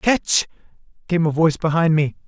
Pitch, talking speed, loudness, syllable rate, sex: 160 Hz, 160 wpm, -19 LUFS, 5.3 syllables/s, male